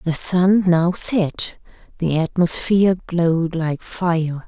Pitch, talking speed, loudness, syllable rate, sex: 170 Hz, 120 wpm, -18 LUFS, 3.4 syllables/s, female